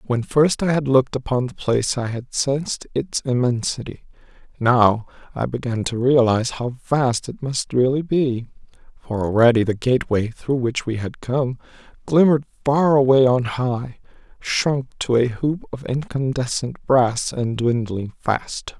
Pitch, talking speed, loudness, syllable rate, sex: 125 Hz, 150 wpm, -20 LUFS, 4.3 syllables/s, male